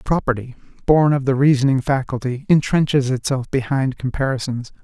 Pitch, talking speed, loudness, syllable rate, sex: 135 Hz, 125 wpm, -19 LUFS, 5.3 syllables/s, male